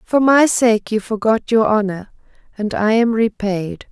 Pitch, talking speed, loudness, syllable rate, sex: 220 Hz, 170 wpm, -16 LUFS, 4.2 syllables/s, female